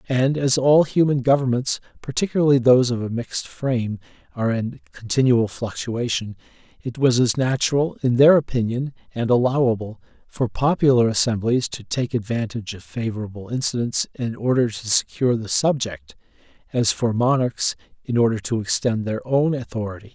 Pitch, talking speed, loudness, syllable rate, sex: 120 Hz, 145 wpm, -21 LUFS, 5.3 syllables/s, male